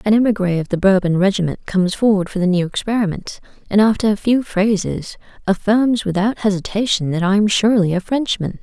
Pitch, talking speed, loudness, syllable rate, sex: 200 Hz, 180 wpm, -17 LUFS, 5.8 syllables/s, female